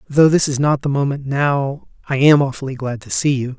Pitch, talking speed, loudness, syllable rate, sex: 140 Hz, 235 wpm, -17 LUFS, 5.3 syllables/s, male